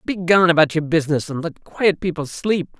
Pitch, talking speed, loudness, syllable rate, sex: 165 Hz, 195 wpm, -19 LUFS, 5.8 syllables/s, male